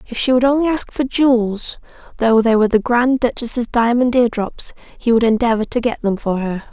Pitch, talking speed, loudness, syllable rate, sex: 235 Hz, 195 wpm, -16 LUFS, 5.1 syllables/s, female